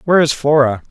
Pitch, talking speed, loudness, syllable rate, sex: 145 Hz, 200 wpm, -14 LUFS, 6.8 syllables/s, male